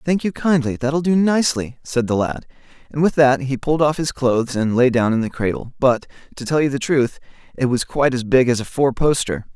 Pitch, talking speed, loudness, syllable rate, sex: 135 Hz, 240 wpm, -19 LUFS, 5.6 syllables/s, male